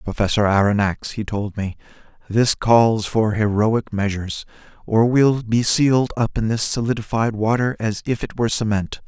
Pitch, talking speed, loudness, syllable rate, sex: 110 Hz, 160 wpm, -19 LUFS, 4.8 syllables/s, male